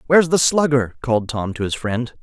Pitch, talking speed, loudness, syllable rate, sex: 130 Hz, 215 wpm, -19 LUFS, 5.7 syllables/s, male